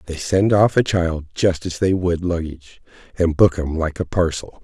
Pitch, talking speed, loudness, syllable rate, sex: 85 Hz, 205 wpm, -19 LUFS, 4.8 syllables/s, male